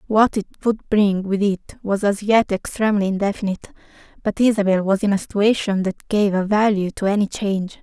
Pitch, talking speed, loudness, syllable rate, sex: 200 Hz, 185 wpm, -20 LUFS, 5.6 syllables/s, female